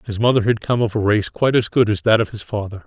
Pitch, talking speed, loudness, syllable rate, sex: 110 Hz, 315 wpm, -18 LUFS, 6.6 syllables/s, male